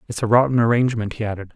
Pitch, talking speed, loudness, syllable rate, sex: 115 Hz, 230 wpm, -19 LUFS, 8.1 syllables/s, male